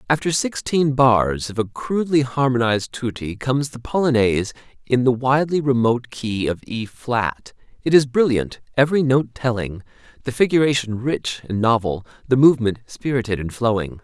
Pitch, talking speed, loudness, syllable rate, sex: 125 Hz, 150 wpm, -20 LUFS, 5.2 syllables/s, male